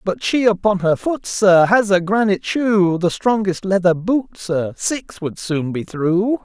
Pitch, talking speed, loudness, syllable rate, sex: 195 Hz, 185 wpm, -18 LUFS, 4.1 syllables/s, male